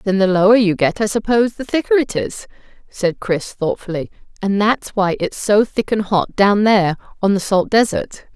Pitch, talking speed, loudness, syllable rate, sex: 205 Hz, 200 wpm, -17 LUFS, 5.0 syllables/s, female